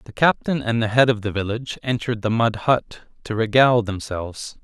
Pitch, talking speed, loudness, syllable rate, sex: 115 Hz, 195 wpm, -21 LUFS, 5.6 syllables/s, male